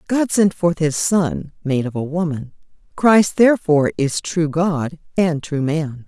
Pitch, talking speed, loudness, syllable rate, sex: 165 Hz, 170 wpm, -18 LUFS, 4.1 syllables/s, female